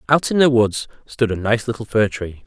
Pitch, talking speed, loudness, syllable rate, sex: 115 Hz, 245 wpm, -19 LUFS, 5.2 syllables/s, male